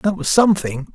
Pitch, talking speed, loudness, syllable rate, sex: 180 Hz, 190 wpm, -17 LUFS, 5.8 syllables/s, male